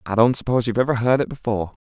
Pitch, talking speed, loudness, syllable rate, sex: 120 Hz, 260 wpm, -20 LUFS, 8.3 syllables/s, male